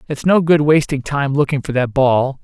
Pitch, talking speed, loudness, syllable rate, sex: 140 Hz, 220 wpm, -16 LUFS, 4.9 syllables/s, male